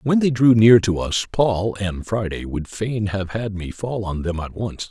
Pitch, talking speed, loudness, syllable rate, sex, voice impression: 105 Hz, 235 wpm, -20 LUFS, 4.2 syllables/s, male, masculine, middle-aged, tensed, powerful, slightly hard, clear, fluent, intellectual, sincere, mature, reassuring, wild, strict